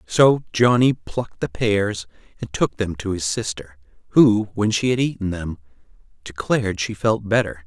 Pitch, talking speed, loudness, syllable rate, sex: 105 Hz, 165 wpm, -20 LUFS, 4.6 syllables/s, male